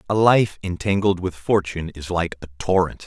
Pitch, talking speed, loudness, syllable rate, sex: 90 Hz, 175 wpm, -21 LUFS, 5.2 syllables/s, male